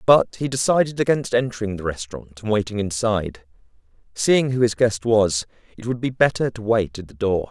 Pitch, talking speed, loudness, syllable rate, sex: 110 Hz, 190 wpm, -21 LUFS, 5.5 syllables/s, male